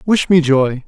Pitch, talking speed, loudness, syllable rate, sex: 155 Hz, 205 wpm, -13 LUFS, 4.0 syllables/s, male